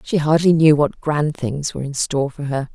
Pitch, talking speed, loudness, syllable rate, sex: 145 Hz, 240 wpm, -18 LUFS, 5.3 syllables/s, female